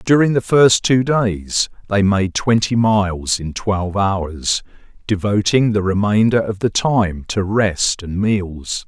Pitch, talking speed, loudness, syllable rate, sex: 105 Hz, 150 wpm, -17 LUFS, 3.7 syllables/s, male